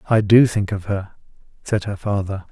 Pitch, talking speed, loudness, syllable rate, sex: 100 Hz, 190 wpm, -19 LUFS, 4.9 syllables/s, male